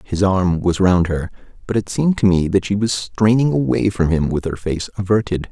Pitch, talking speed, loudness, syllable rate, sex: 95 Hz, 230 wpm, -18 LUFS, 5.2 syllables/s, male